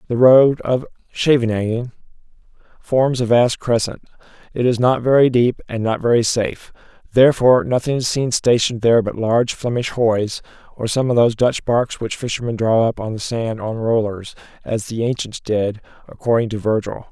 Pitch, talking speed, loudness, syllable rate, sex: 115 Hz, 170 wpm, -18 LUFS, 5.3 syllables/s, male